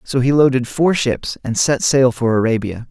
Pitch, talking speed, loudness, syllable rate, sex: 125 Hz, 205 wpm, -16 LUFS, 4.7 syllables/s, male